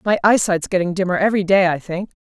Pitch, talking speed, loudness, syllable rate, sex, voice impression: 185 Hz, 215 wpm, -17 LUFS, 6.6 syllables/s, female, very feminine, very adult-like, middle-aged, thin, tensed, slightly powerful, slightly dark, very hard, very clear, very fluent, slightly raspy, slightly cute, cool, very intellectual, refreshing, very sincere, very calm, friendly, reassuring, unique, very elegant, wild, very sweet, slightly lively, kind, slightly sharp, slightly modest, light